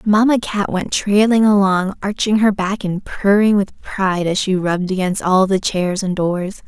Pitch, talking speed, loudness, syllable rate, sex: 195 Hz, 190 wpm, -17 LUFS, 4.5 syllables/s, female